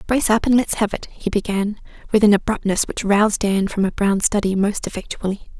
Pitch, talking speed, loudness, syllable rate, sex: 205 Hz, 215 wpm, -19 LUFS, 5.8 syllables/s, female